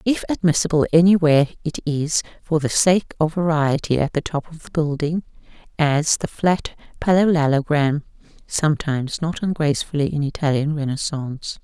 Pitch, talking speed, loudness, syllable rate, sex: 155 Hz, 135 wpm, -20 LUFS, 5.2 syllables/s, female